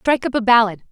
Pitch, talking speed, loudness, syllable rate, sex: 230 Hz, 265 wpm, -16 LUFS, 7.1 syllables/s, female